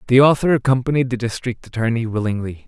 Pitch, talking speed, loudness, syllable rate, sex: 120 Hz, 155 wpm, -19 LUFS, 6.5 syllables/s, male